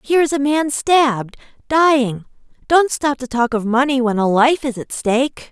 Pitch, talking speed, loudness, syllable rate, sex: 265 Hz, 195 wpm, -17 LUFS, 4.9 syllables/s, female